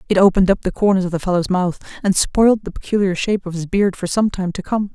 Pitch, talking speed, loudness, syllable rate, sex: 190 Hz, 265 wpm, -18 LUFS, 6.5 syllables/s, female